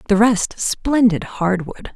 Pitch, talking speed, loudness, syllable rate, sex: 210 Hz, 125 wpm, -18 LUFS, 3.5 syllables/s, female